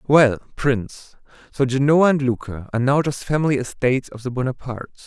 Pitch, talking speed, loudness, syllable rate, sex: 130 Hz, 165 wpm, -20 LUFS, 5.9 syllables/s, male